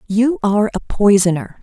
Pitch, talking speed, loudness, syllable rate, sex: 215 Hz, 150 wpm, -15 LUFS, 5.3 syllables/s, female